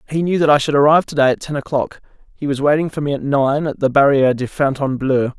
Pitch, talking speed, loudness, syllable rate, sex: 140 Hz, 255 wpm, -16 LUFS, 6.7 syllables/s, male